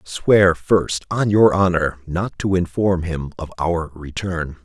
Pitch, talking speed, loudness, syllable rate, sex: 90 Hz, 155 wpm, -19 LUFS, 3.6 syllables/s, male